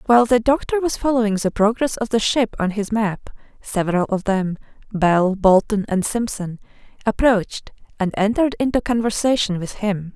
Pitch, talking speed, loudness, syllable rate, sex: 215 Hz, 160 wpm, -19 LUFS, 5.2 syllables/s, female